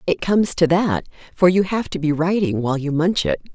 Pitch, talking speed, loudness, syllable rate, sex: 170 Hz, 235 wpm, -19 LUFS, 5.7 syllables/s, female